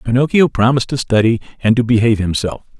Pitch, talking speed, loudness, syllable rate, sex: 120 Hz, 170 wpm, -15 LUFS, 6.7 syllables/s, male